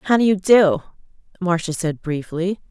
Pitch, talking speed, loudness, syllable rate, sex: 180 Hz, 155 wpm, -19 LUFS, 4.5 syllables/s, female